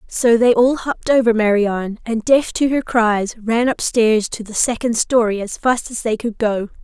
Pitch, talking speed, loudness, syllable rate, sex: 230 Hz, 200 wpm, -17 LUFS, 4.6 syllables/s, female